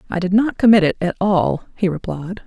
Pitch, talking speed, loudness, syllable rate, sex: 185 Hz, 220 wpm, -17 LUFS, 5.4 syllables/s, female